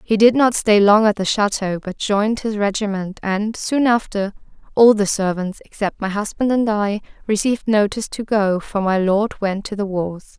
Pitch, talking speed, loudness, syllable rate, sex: 205 Hz, 195 wpm, -18 LUFS, 4.8 syllables/s, female